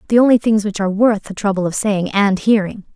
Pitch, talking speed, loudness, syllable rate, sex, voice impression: 205 Hz, 245 wpm, -16 LUFS, 6.0 syllables/s, female, very feminine, young, very thin, slightly tensed, very weak, soft, very clear, very fluent, very cute, very intellectual, very refreshing, sincere, calm, very friendly, very reassuring, very unique, very elegant, slightly wild, very kind, sharp, very modest, very light